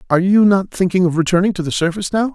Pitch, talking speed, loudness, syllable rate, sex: 185 Hz, 255 wpm, -16 LUFS, 7.4 syllables/s, male